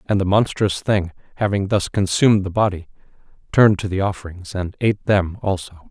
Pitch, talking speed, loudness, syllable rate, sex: 95 Hz, 175 wpm, -19 LUFS, 5.7 syllables/s, male